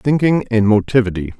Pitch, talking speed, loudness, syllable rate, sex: 115 Hz, 130 wpm, -15 LUFS, 5.2 syllables/s, male